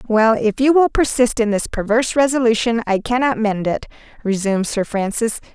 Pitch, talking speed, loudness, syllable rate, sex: 225 Hz, 175 wpm, -17 LUFS, 5.5 syllables/s, female